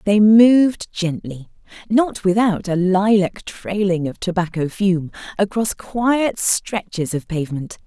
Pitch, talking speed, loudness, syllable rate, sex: 195 Hz, 120 wpm, -18 LUFS, 3.9 syllables/s, female